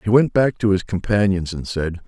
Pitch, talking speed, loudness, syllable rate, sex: 100 Hz, 230 wpm, -19 LUFS, 5.1 syllables/s, male